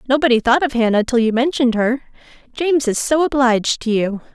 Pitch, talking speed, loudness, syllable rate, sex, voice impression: 250 Hz, 180 wpm, -17 LUFS, 6.2 syllables/s, female, very feminine, slightly young, very adult-like, very thin, tensed, slightly powerful, very bright, slightly soft, very clear, fluent, very cute, slightly intellectual, very refreshing, sincere, calm, friendly, slightly reassuring, very unique, elegant, slightly wild, very sweet, very lively, very kind, slightly intense, sharp, very light